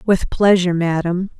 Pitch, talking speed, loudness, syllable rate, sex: 180 Hz, 130 wpm, -17 LUFS, 5.0 syllables/s, female